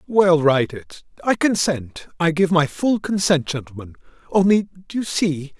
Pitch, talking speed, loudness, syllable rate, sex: 165 Hz, 160 wpm, -19 LUFS, 4.7 syllables/s, male